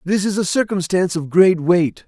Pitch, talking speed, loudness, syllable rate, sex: 180 Hz, 205 wpm, -17 LUFS, 5.1 syllables/s, male